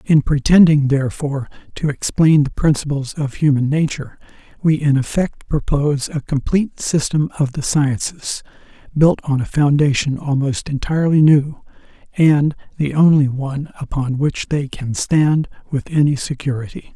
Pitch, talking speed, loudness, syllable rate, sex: 145 Hz, 140 wpm, -17 LUFS, 4.8 syllables/s, male